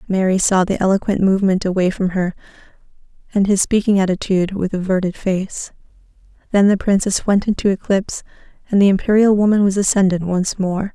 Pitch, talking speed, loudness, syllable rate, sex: 195 Hz, 160 wpm, -17 LUFS, 5.8 syllables/s, female